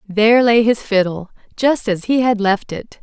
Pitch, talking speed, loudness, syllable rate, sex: 220 Hz, 200 wpm, -15 LUFS, 4.6 syllables/s, female